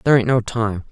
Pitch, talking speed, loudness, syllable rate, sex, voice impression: 115 Hz, 260 wpm, -18 LUFS, 6.7 syllables/s, male, masculine, adult-like, slightly dark, slightly sincere, calm